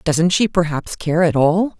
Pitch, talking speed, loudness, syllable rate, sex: 170 Hz, 200 wpm, -17 LUFS, 4.2 syllables/s, female